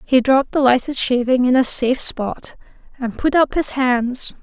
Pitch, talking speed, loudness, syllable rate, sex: 255 Hz, 190 wpm, -17 LUFS, 4.7 syllables/s, female